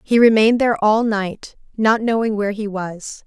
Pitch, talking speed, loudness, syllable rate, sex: 215 Hz, 185 wpm, -17 LUFS, 5.0 syllables/s, female